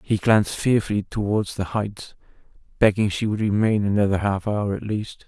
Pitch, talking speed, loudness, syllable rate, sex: 105 Hz, 170 wpm, -22 LUFS, 5.1 syllables/s, male